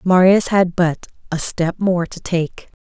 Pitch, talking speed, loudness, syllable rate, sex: 180 Hz, 170 wpm, -17 LUFS, 3.8 syllables/s, female